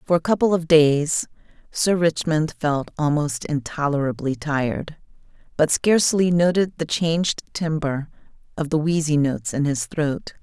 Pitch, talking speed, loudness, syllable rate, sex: 155 Hz, 140 wpm, -21 LUFS, 4.6 syllables/s, female